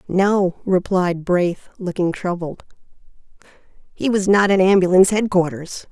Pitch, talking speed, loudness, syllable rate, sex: 185 Hz, 110 wpm, -18 LUFS, 4.4 syllables/s, female